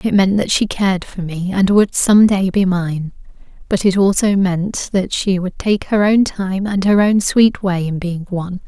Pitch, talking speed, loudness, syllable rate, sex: 190 Hz, 220 wpm, -16 LUFS, 4.3 syllables/s, female